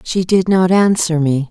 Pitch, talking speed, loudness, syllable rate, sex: 175 Hz, 200 wpm, -14 LUFS, 4.3 syllables/s, female